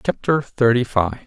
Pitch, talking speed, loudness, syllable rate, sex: 120 Hz, 140 wpm, -19 LUFS, 4.7 syllables/s, male